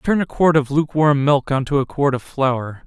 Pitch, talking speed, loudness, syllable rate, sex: 140 Hz, 250 wpm, -18 LUFS, 5.0 syllables/s, male